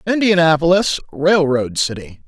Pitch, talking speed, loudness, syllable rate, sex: 165 Hz, 80 wpm, -15 LUFS, 4.6 syllables/s, male